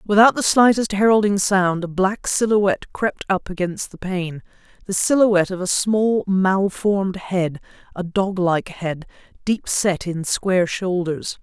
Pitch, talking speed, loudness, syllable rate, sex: 190 Hz, 145 wpm, -19 LUFS, 4.2 syllables/s, female